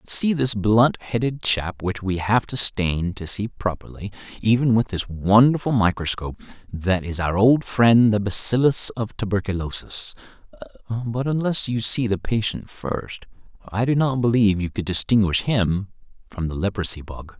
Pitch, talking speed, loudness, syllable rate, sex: 105 Hz, 160 wpm, -21 LUFS, 4.5 syllables/s, male